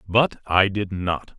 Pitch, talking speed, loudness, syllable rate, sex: 100 Hz, 175 wpm, -22 LUFS, 3.4 syllables/s, male